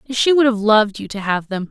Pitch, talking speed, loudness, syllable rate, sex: 220 Hz, 280 wpm, -17 LUFS, 6.0 syllables/s, female